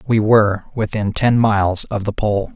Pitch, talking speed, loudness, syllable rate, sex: 105 Hz, 190 wpm, -17 LUFS, 4.8 syllables/s, male